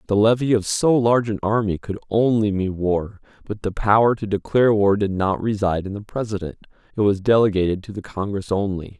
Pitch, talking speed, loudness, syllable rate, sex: 105 Hz, 195 wpm, -20 LUFS, 5.7 syllables/s, male